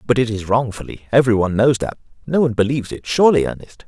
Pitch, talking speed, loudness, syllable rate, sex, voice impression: 120 Hz, 215 wpm, -18 LUFS, 7.4 syllables/s, male, masculine, middle-aged, thick, tensed, powerful, hard, raspy, intellectual, calm, mature, wild, lively, strict, slightly sharp